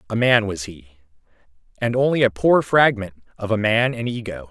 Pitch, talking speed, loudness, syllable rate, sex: 110 Hz, 185 wpm, -19 LUFS, 5.0 syllables/s, male